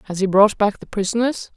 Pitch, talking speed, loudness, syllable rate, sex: 210 Hz, 230 wpm, -18 LUFS, 5.9 syllables/s, female